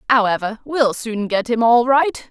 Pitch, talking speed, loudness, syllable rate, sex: 235 Hz, 180 wpm, -17 LUFS, 4.4 syllables/s, female